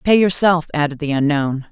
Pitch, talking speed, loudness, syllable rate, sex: 155 Hz, 175 wpm, -17 LUFS, 5.2 syllables/s, female